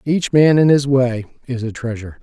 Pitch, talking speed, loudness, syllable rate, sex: 130 Hz, 215 wpm, -16 LUFS, 5.0 syllables/s, male